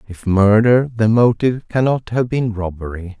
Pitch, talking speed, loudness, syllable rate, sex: 110 Hz, 150 wpm, -16 LUFS, 4.8 syllables/s, male